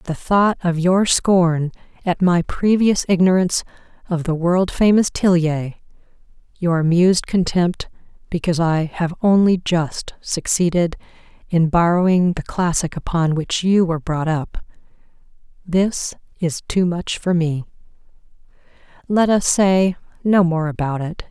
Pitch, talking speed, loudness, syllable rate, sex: 175 Hz, 130 wpm, -18 LUFS, 4.2 syllables/s, female